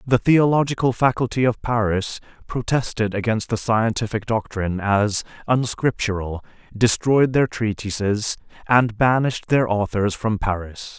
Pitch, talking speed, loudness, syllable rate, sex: 115 Hz, 115 wpm, -21 LUFS, 4.5 syllables/s, male